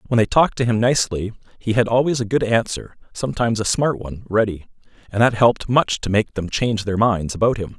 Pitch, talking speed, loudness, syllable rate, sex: 115 Hz, 225 wpm, -19 LUFS, 6.2 syllables/s, male